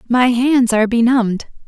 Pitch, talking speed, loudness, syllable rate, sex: 240 Hz, 145 wpm, -14 LUFS, 5.2 syllables/s, female